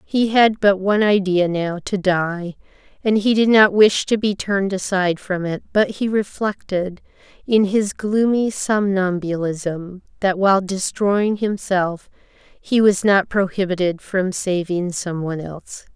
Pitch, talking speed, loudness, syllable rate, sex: 195 Hz, 145 wpm, -19 LUFS, 4.1 syllables/s, female